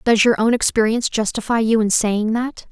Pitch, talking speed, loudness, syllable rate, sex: 225 Hz, 220 wpm, -18 LUFS, 5.8 syllables/s, female